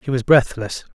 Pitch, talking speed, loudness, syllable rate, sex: 125 Hz, 190 wpm, -17 LUFS, 5.1 syllables/s, male